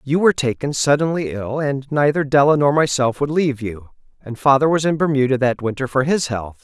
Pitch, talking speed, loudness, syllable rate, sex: 140 Hz, 210 wpm, -18 LUFS, 5.6 syllables/s, male